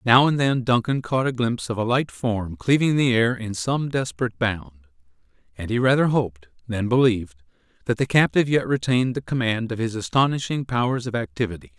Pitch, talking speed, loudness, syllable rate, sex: 120 Hz, 190 wpm, -22 LUFS, 5.8 syllables/s, male